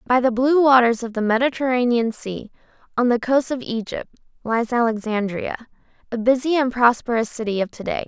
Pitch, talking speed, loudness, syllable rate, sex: 240 Hz, 170 wpm, -20 LUFS, 5.4 syllables/s, female